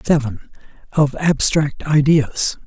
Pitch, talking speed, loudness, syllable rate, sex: 150 Hz, 90 wpm, -17 LUFS, 3.6 syllables/s, male